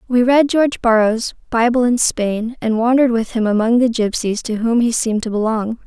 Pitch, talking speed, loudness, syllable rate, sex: 230 Hz, 205 wpm, -16 LUFS, 5.3 syllables/s, female